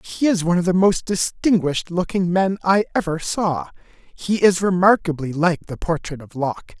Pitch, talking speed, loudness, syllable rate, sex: 175 Hz, 175 wpm, -20 LUFS, 5.0 syllables/s, male